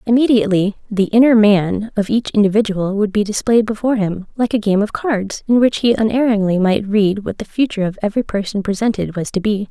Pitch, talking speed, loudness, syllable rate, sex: 210 Hz, 205 wpm, -16 LUFS, 5.8 syllables/s, female